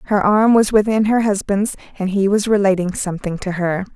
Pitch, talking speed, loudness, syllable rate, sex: 200 Hz, 195 wpm, -17 LUFS, 5.2 syllables/s, female